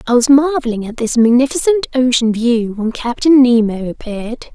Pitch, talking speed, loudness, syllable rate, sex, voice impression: 245 Hz, 160 wpm, -14 LUFS, 5.1 syllables/s, female, very feminine, very young, very thin, very relaxed, slightly weak, bright, very soft, clear, fluent, slightly raspy, very cute, intellectual, very refreshing, sincere, calm, very friendly, very reassuring, very unique, very elegant, slightly wild, very sweet, lively, very kind, slightly intense, slightly sharp, very light